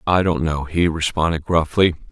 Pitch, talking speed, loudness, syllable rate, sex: 80 Hz, 170 wpm, -19 LUFS, 5.0 syllables/s, male